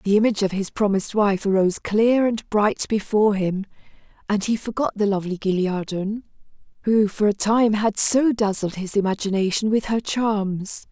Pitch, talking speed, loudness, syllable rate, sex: 210 Hz, 165 wpm, -21 LUFS, 5.1 syllables/s, female